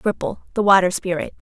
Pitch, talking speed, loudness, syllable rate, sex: 190 Hz, 160 wpm, -19 LUFS, 6.4 syllables/s, female